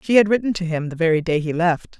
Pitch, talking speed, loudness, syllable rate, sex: 175 Hz, 300 wpm, -20 LUFS, 6.4 syllables/s, female